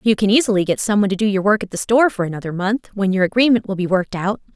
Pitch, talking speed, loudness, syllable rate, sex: 205 Hz, 290 wpm, -18 LUFS, 7.5 syllables/s, female